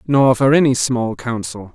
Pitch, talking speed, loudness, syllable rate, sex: 125 Hz, 170 wpm, -16 LUFS, 4.4 syllables/s, male